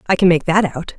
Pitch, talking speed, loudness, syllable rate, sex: 175 Hz, 305 wpm, -16 LUFS, 6.4 syllables/s, female